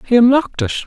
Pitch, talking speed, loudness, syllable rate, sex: 215 Hz, 210 wpm, -14 LUFS, 8.6 syllables/s, male